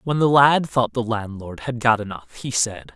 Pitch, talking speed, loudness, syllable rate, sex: 115 Hz, 225 wpm, -20 LUFS, 4.6 syllables/s, male